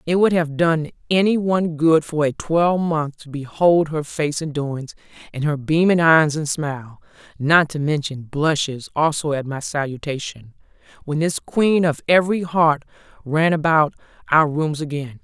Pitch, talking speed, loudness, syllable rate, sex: 155 Hz, 165 wpm, -19 LUFS, 4.3 syllables/s, female